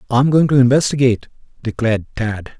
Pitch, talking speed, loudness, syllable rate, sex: 125 Hz, 140 wpm, -16 LUFS, 6.4 syllables/s, male